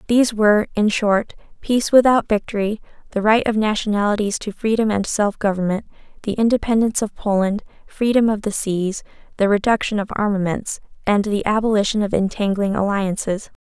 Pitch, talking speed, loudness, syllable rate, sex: 210 Hz, 150 wpm, -19 LUFS, 5.6 syllables/s, female